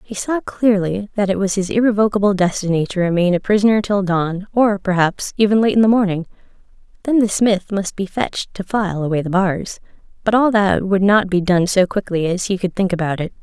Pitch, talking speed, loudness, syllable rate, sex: 195 Hz, 215 wpm, -17 LUFS, 5.5 syllables/s, female